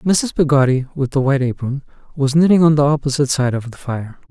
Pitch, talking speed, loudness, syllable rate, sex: 140 Hz, 210 wpm, -17 LUFS, 6.1 syllables/s, male